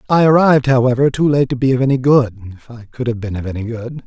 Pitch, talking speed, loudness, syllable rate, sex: 125 Hz, 265 wpm, -15 LUFS, 6.5 syllables/s, male